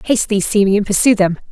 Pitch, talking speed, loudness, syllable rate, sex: 205 Hz, 200 wpm, -14 LUFS, 6.1 syllables/s, female